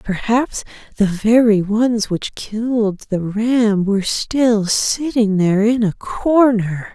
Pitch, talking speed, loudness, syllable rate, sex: 215 Hz, 130 wpm, -17 LUFS, 3.4 syllables/s, female